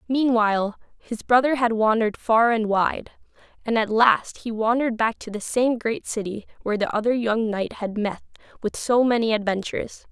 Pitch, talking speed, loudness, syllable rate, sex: 225 Hz, 180 wpm, -22 LUFS, 5.1 syllables/s, female